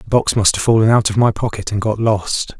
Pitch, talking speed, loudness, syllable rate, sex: 105 Hz, 275 wpm, -16 LUFS, 5.5 syllables/s, male